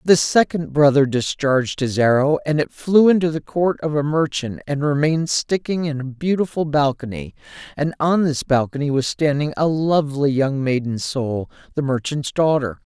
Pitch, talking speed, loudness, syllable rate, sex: 145 Hz, 165 wpm, -19 LUFS, 4.9 syllables/s, male